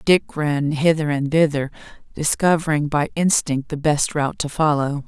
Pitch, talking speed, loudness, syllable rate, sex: 150 Hz, 155 wpm, -20 LUFS, 4.7 syllables/s, female